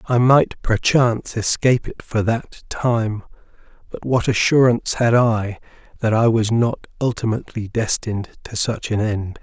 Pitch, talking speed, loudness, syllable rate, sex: 115 Hz, 145 wpm, -19 LUFS, 4.5 syllables/s, male